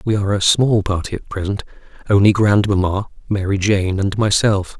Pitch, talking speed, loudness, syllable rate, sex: 100 Hz, 165 wpm, -17 LUFS, 5.2 syllables/s, male